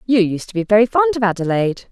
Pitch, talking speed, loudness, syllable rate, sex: 215 Hz, 250 wpm, -17 LUFS, 6.7 syllables/s, female